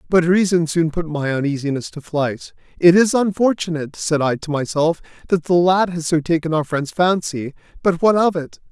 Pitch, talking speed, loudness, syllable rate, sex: 165 Hz, 195 wpm, -18 LUFS, 5.0 syllables/s, male